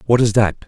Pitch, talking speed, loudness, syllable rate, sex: 110 Hz, 265 wpm, -16 LUFS, 5.7 syllables/s, male